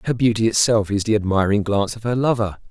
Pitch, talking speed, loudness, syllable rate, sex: 110 Hz, 220 wpm, -19 LUFS, 6.5 syllables/s, male